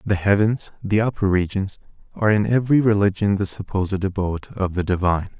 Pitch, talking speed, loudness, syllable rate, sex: 100 Hz, 165 wpm, -21 LUFS, 6.1 syllables/s, male